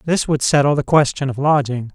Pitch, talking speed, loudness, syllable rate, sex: 140 Hz, 215 wpm, -17 LUFS, 5.5 syllables/s, male